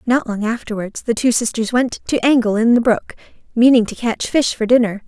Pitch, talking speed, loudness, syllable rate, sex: 230 Hz, 215 wpm, -17 LUFS, 5.3 syllables/s, female